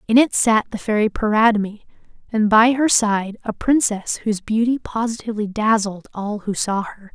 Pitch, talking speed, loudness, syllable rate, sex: 220 Hz, 170 wpm, -19 LUFS, 5.0 syllables/s, female